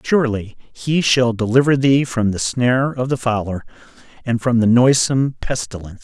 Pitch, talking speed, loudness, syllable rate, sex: 120 Hz, 160 wpm, -17 LUFS, 5.1 syllables/s, male